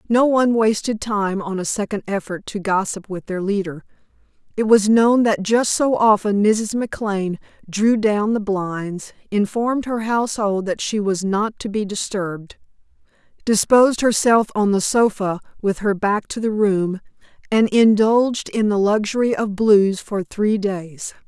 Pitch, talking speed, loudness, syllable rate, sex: 210 Hz, 160 wpm, -19 LUFS, 4.5 syllables/s, female